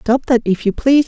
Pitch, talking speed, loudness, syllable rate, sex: 245 Hz, 280 wpm, -15 LUFS, 6.0 syllables/s, female